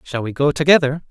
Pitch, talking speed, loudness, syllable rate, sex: 145 Hz, 220 wpm, -16 LUFS, 6.3 syllables/s, male